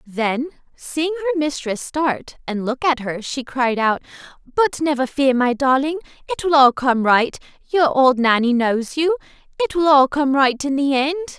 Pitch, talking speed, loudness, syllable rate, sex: 280 Hz, 185 wpm, -18 LUFS, 4.4 syllables/s, female